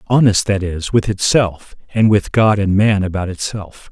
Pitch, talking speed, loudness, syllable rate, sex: 100 Hz, 185 wpm, -16 LUFS, 4.4 syllables/s, male